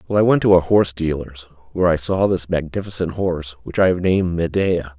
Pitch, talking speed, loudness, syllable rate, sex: 85 Hz, 215 wpm, -19 LUFS, 6.0 syllables/s, male